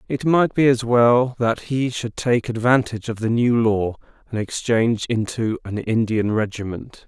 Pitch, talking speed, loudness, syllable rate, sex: 115 Hz, 170 wpm, -20 LUFS, 4.5 syllables/s, male